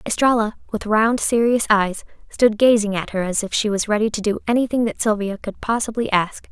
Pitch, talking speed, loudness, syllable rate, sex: 215 Hz, 205 wpm, -19 LUFS, 5.4 syllables/s, female